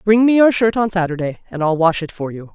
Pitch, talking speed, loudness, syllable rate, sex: 185 Hz, 285 wpm, -17 LUFS, 6.0 syllables/s, female